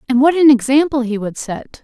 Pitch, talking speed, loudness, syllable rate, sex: 265 Hz, 230 wpm, -14 LUFS, 5.5 syllables/s, female